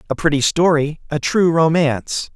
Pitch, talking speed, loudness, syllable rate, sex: 155 Hz, 155 wpm, -17 LUFS, 4.9 syllables/s, male